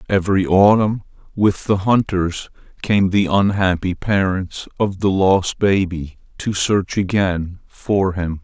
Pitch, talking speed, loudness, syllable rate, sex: 95 Hz, 130 wpm, -18 LUFS, 3.7 syllables/s, male